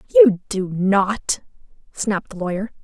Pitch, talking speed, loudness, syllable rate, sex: 195 Hz, 125 wpm, -20 LUFS, 4.7 syllables/s, female